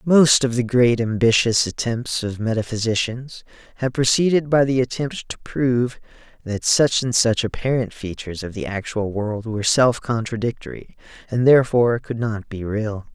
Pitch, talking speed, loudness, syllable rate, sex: 115 Hz, 155 wpm, -20 LUFS, 4.9 syllables/s, male